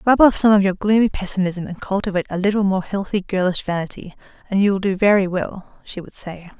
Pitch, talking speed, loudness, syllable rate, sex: 195 Hz, 220 wpm, -19 LUFS, 6.1 syllables/s, female